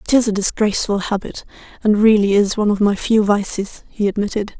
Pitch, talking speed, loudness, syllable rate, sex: 205 Hz, 195 wpm, -17 LUFS, 5.9 syllables/s, female